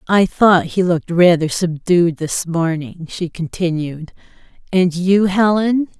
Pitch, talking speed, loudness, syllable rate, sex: 175 Hz, 130 wpm, -16 LUFS, 3.9 syllables/s, female